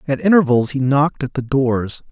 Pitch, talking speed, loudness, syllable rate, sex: 135 Hz, 200 wpm, -17 LUFS, 5.3 syllables/s, male